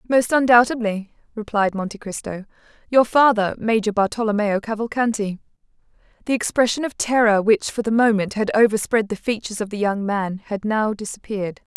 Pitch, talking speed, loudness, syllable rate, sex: 215 Hz, 150 wpm, -20 LUFS, 5.5 syllables/s, female